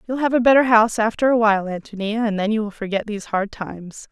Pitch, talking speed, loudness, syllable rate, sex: 215 Hz, 220 wpm, -19 LUFS, 6.1 syllables/s, female